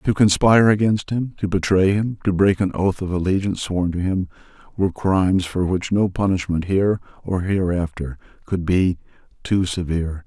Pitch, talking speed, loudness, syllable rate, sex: 95 Hz, 170 wpm, -20 LUFS, 5.2 syllables/s, male